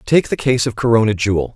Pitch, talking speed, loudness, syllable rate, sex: 115 Hz, 230 wpm, -16 LUFS, 6.3 syllables/s, male